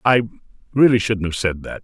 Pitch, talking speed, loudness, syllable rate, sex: 110 Hz, 195 wpm, -19 LUFS, 5.0 syllables/s, male